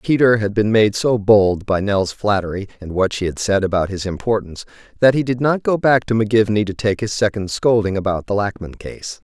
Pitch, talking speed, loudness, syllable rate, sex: 105 Hz, 220 wpm, -18 LUFS, 5.6 syllables/s, male